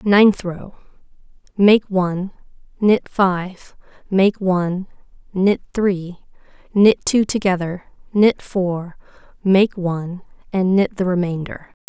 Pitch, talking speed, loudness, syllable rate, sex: 190 Hz, 100 wpm, -18 LUFS, 3.6 syllables/s, female